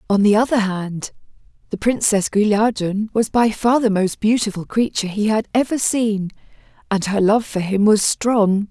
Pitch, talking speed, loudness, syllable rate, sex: 215 Hz, 170 wpm, -18 LUFS, 4.7 syllables/s, female